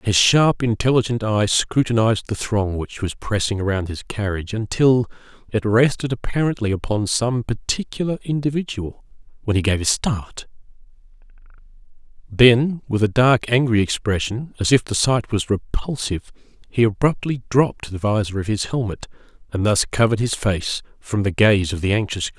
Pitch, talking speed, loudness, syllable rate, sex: 110 Hz, 155 wpm, -20 LUFS, 5.1 syllables/s, male